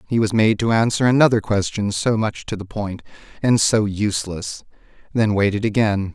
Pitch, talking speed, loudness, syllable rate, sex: 105 Hz, 175 wpm, -19 LUFS, 5.1 syllables/s, male